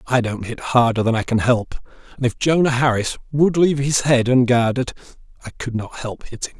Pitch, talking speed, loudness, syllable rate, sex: 125 Hz, 210 wpm, -19 LUFS, 5.7 syllables/s, male